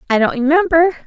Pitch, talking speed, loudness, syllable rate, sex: 300 Hz, 170 wpm, -14 LUFS, 6.9 syllables/s, female